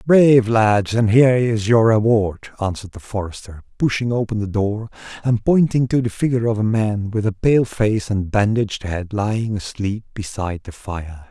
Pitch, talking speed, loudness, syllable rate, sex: 110 Hz, 180 wpm, -19 LUFS, 5.0 syllables/s, male